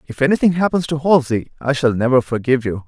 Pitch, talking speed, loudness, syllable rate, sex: 140 Hz, 210 wpm, -17 LUFS, 6.5 syllables/s, male